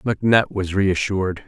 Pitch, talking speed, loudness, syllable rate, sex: 100 Hz, 120 wpm, -20 LUFS, 5.0 syllables/s, male